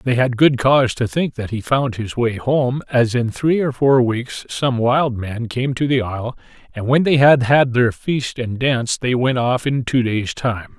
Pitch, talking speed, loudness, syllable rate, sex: 125 Hz, 230 wpm, -18 LUFS, 4.4 syllables/s, male